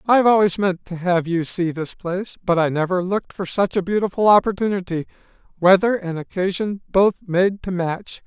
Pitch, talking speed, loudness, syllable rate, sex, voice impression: 185 Hz, 175 wpm, -20 LUFS, 5.3 syllables/s, male, masculine, adult-like, very middle-aged, slightly thick, slightly relaxed, slightly weak, slightly dark, slightly clear, slightly halting, sincere, slightly calm, slightly friendly, reassuring, slightly unique, elegant, slightly wild, slightly sweet, slightly lively